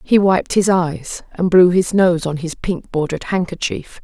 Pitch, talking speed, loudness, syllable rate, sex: 175 Hz, 195 wpm, -17 LUFS, 4.4 syllables/s, female